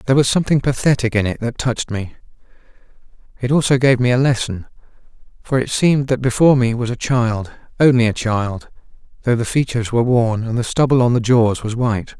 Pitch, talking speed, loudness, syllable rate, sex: 120 Hz, 190 wpm, -17 LUFS, 6.2 syllables/s, male